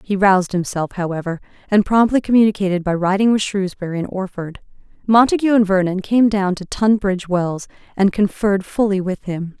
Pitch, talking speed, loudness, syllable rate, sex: 195 Hz, 165 wpm, -17 LUFS, 5.5 syllables/s, female